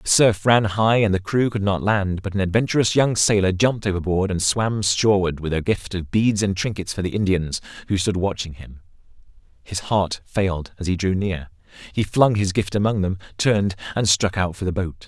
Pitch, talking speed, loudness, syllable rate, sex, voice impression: 100 Hz, 215 wpm, -21 LUFS, 5.3 syllables/s, male, masculine, adult-like, tensed, powerful, bright, clear, cool, intellectual, friendly, wild, lively, slightly intense